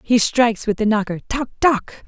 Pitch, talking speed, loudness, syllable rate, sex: 230 Hz, 200 wpm, -19 LUFS, 5.0 syllables/s, female